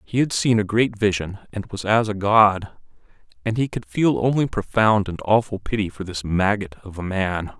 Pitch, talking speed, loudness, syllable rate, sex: 105 Hz, 205 wpm, -21 LUFS, 4.9 syllables/s, male